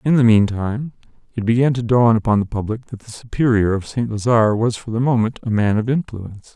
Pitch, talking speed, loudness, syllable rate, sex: 115 Hz, 220 wpm, -18 LUFS, 6.0 syllables/s, male